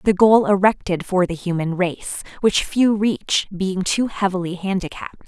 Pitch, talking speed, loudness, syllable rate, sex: 190 Hz, 160 wpm, -19 LUFS, 4.6 syllables/s, female